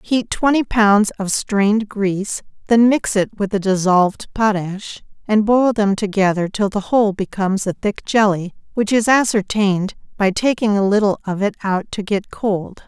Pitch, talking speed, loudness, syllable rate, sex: 205 Hz, 170 wpm, -17 LUFS, 4.7 syllables/s, female